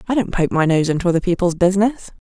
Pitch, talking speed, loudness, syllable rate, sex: 185 Hz, 235 wpm, -17 LUFS, 7.1 syllables/s, female